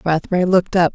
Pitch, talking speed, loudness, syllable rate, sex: 175 Hz, 190 wpm, -17 LUFS, 7.2 syllables/s, female